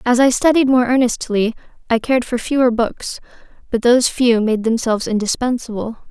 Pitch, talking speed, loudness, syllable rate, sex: 240 Hz, 155 wpm, -16 LUFS, 5.5 syllables/s, female